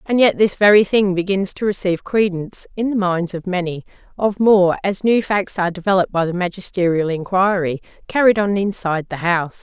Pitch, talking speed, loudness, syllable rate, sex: 190 Hz, 180 wpm, -18 LUFS, 5.7 syllables/s, female